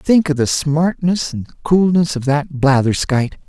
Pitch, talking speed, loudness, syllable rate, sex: 150 Hz, 155 wpm, -16 LUFS, 4.4 syllables/s, male